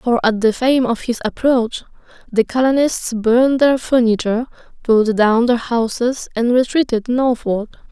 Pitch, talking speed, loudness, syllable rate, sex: 240 Hz, 145 wpm, -16 LUFS, 4.6 syllables/s, female